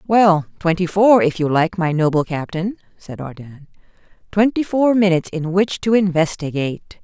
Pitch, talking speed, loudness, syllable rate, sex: 180 Hz, 155 wpm, -17 LUFS, 5.0 syllables/s, female